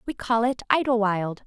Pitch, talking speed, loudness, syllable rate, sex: 225 Hz, 165 wpm, -23 LUFS, 4.8 syllables/s, female